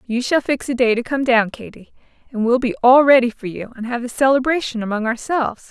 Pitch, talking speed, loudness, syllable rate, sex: 245 Hz, 230 wpm, -18 LUFS, 5.8 syllables/s, female